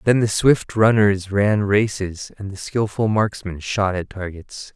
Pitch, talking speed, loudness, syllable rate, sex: 100 Hz, 165 wpm, -20 LUFS, 3.9 syllables/s, male